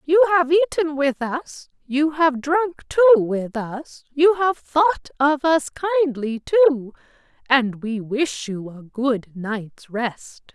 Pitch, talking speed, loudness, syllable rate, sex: 275 Hz, 150 wpm, -20 LUFS, 3.6 syllables/s, female